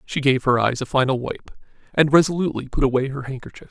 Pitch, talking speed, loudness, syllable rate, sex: 135 Hz, 210 wpm, -20 LUFS, 6.5 syllables/s, male